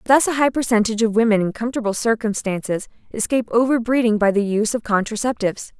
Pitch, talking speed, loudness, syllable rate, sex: 225 Hz, 165 wpm, -19 LUFS, 6.7 syllables/s, female